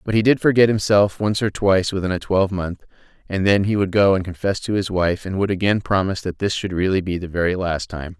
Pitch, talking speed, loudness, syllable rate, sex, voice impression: 95 Hz, 250 wpm, -20 LUFS, 6.0 syllables/s, male, very masculine, very adult-like, very middle-aged, very thick, tensed, very powerful, dark, very hard, clear, very fluent, cool, very intellectual, very sincere, very calm, mature, friendly, very reassuring, very unique, elegant, wild, sweet, kind, slightly modest